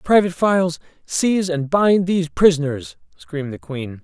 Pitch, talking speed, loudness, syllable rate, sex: 160 Hz, 150 wpm, -19 LUFS, 5.2 syllables/s, male